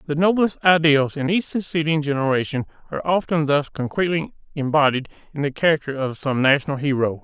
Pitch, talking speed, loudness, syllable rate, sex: 150 Hz, 160 wpm, -20 LUFS, 6.1 syllables/s, male